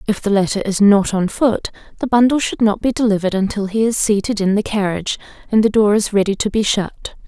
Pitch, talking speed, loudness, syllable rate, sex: 210 Hz, 230 wpm, -16 LUFS, 5.9 syllables/s, female